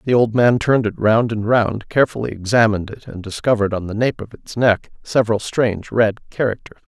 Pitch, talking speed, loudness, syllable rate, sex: 110 Hz, 200 wpm, -18 LUFS, 5.8 syllables/s, male